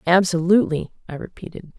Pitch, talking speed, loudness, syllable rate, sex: 175 Hz, 100 wpm, -19 LUFS, 6.0 syllables/s, female